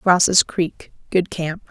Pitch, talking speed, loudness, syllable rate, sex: 175 Hz, 105 wpm, -19 LUFS, 2.9 syllables/s, female